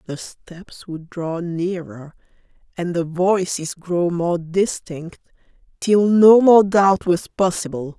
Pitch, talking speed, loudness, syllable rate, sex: 175 Hz, 130 wpm, -18 LUFS, 3.3 syllables/s, female